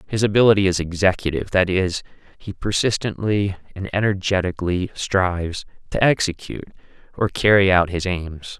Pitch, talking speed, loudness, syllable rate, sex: 95 Hz, 125 wpm, -20 LUFS, 5.4 syllables/s, male